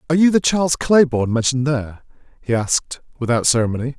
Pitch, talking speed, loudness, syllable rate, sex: 135 Hz, 165 wpm, -18 LUFS, 7.1 syllables/s, male